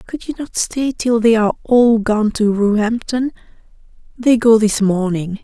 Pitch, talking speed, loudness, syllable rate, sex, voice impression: 225 Hz, 165 wpm, -16 LUFS, 4.4 syllables/s, female, feminine, adult-like, slightly clear, slightly intellectual, slightly calm, slightly strict